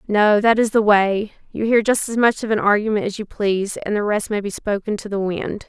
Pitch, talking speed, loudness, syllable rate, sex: 210 Hz, 265 wpm, -19 LUFS, 5.4 syllables/s, female